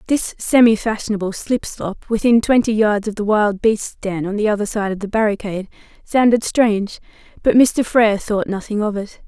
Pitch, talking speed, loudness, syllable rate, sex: 215 Hz, 190 wpm, -18 LUFS, 5.2 syllables/s, female